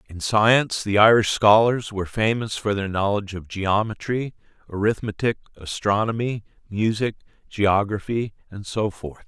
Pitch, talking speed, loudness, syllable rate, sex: 105 Hz, 125 wpm, -22 LUFS, 4.7 syllables/s, male